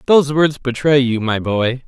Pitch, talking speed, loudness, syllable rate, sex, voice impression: 130 Hz, 190 wpm, -16 LUFS, 4.7 syllables/s, male, masculine, adult-like, tensed, powerful, slightly bright, clear, raspy, cool, intellectual, slightly friendly, wild, lively, slightly sharp